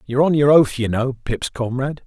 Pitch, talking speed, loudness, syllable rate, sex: 130 Hz, 230 wpm, -18 LUFS, 6.0 syllables/s, male